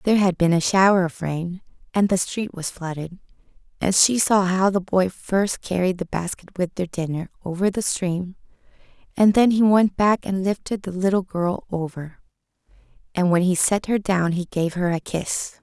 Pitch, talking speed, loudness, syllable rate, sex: 185 Hz, 190 wpm, -21 LUFS, 4.8 syllables/s, female